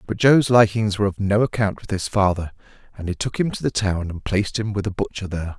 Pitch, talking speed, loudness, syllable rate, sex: 100 Hz, 260 wpm, -21 LUFS, 6.2 syllables/s, male